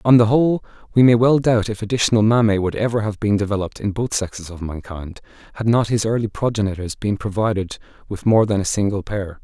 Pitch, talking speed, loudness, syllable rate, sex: 105 Hz, 210 wpm, -19 LUFS, 6.1 syllables/s, male